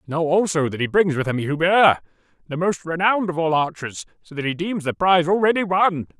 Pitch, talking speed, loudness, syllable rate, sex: 165 Hz, 215 wpm, -20 LUFS, 5.7 syllables/s, male